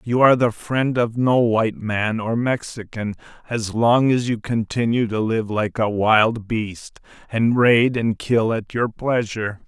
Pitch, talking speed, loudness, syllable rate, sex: 115 Hz, 175 wpm, -20 LUFS, 4.0 syllables/s, male